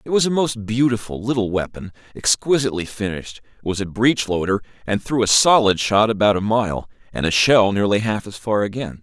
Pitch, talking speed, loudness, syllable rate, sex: 110 Hz, 195 wpm, -19 LUFS, 5.5 syllables/s, male